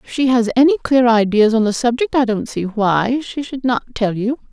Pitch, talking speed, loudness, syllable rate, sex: 240 Hz, 240 wpm, -16 LUFS, 5.0 syllables/s, female